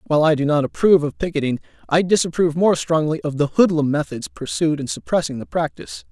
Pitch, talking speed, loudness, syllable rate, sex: 155 Hz, 195 wpm, -19 LUFS, 6.4 syllables/s, male